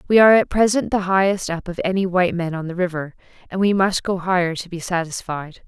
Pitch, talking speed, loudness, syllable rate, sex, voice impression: 185 Hz, 235 wpm, -20 LUFS, 6.0 syllables/s, female, feminine, adult-like, tensed, slightly bright, slightly hard, clear, fluent, intellectual, calm, elegant, slightly strict, slightly sharp